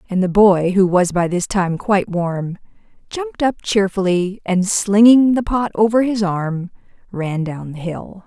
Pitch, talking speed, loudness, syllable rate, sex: 195 Hz, 175 wpm, -17 LUFS, 4.3 syllables/s, female